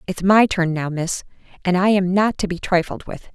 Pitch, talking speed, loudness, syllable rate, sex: 185 Hz, 235 wpm, -19 LUFS, 5.1 syllables/s, female